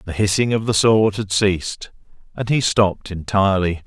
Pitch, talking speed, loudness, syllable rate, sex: 100 Hz, 170 wpm, -18 LUFS, 5.2 syllables/s, male